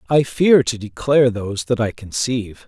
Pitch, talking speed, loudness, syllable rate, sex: 120 Hz, 180 wpm, -18 LUFS, 5.2 syllables/s, male